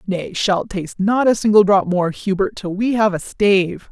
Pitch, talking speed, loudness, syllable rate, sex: 200 Hz, 215 wpm, -17 LUFS, 4.8 syllables/s, female